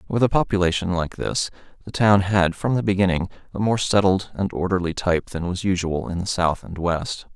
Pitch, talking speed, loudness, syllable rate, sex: 95 Hz, 205 wpm, -22 LUFS, 5.4 syllables/s, male